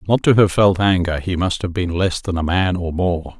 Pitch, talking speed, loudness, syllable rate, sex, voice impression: 90 Hz, 265 wpm, -18 LUFS, 5.0 syllables/s, male, masculine, middle-aged, thick, slightly tensed, powerful, hard, raspy, cool, intellectual, mature, reassuring, wild, lively, strict